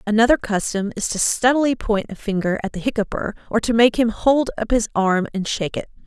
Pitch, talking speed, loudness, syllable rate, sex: 220 Hz, 220 wpm, -20 LUFS, 5.8 syllables/s, female